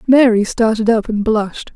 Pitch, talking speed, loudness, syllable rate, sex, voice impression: 225 Hz, 170 wpm, -15 LUFS, 5.0 syllables/s, female, very feminine, young, very thin, relaxed, slightly weak, slightly dark, very soft, slightly muffled, very fluent, slightly raspy, very cute, intellectual, refreshing, very sincere, very calm, very friendly, very reassuring, unique, very elegant, slightly wild, sweet, slightly lively, very kind, very modest, light